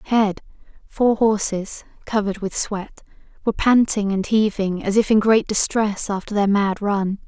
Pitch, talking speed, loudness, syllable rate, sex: 205 Hz, 155 wpm, -20 LUFS, 4.7 syllables/s, female